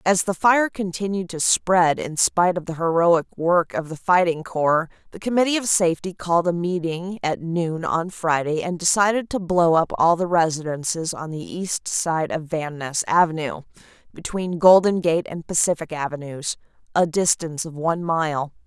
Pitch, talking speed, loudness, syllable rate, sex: 170 Hz, 175 wpm, -21 LUFS, 4.7 syllables/s, female